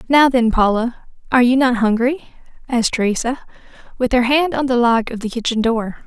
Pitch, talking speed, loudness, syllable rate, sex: 245 Hz, 190 wpm, -17 LUFS, 5.7 syllables/s, female